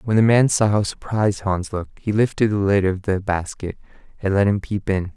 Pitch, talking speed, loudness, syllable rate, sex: 100 Hz, 235 wpm, -20 LUFS, 5.5 syllables/s, male